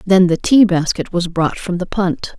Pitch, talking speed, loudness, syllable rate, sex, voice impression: 180 Hz, 225 wpm, -16 LUFS, 4.4 syllables/s, female, feminine, adult-like, slightly weak, slightly soft, fluent, intellectual, calm, slightly reassuring, elegant, slightly kind, slightly modest